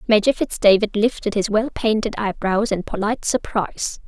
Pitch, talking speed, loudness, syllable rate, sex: 215 Hz, 160 wpm, -20 LUFS, 5.3 syllables/s, female